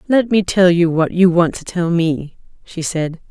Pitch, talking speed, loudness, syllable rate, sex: 175 Hz, 220 wpm, -16 LUFS, 4.3 syllables/s, female